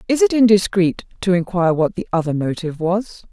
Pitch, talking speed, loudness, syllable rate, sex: 190 Hz, 180 wpm, -18 LUFS, 5.9 syllables/s, female